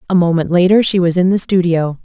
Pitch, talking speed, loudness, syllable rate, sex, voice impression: 180 Hz, 235 wpm, -13 LUFS, 6.0 syllables/s, female, feminine, middle-aged, tensed, powerful, bright, clear, fluent, intellectual, calm, slightly friendly, elegant, lively, slightly strict, slightly sharp